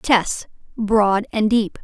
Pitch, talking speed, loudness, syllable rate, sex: 210 Hz, 100 wpm, -19 LUFS, 2.7 syllables/s, female